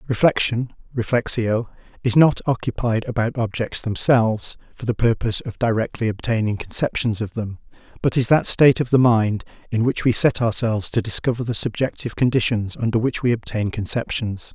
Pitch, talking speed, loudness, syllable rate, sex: 115 Hz, 160 wpm, -21 LUFS, 5.5 syllables/s, male